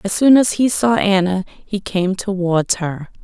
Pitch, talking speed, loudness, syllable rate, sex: 195 Hz, 185 wpm, -17 LUFS, 4.0 syllables/s, female